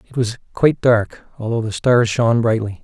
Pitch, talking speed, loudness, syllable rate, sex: 115 Hz, 190 wpm, -17 LUFS, 5.4 syllables/s, male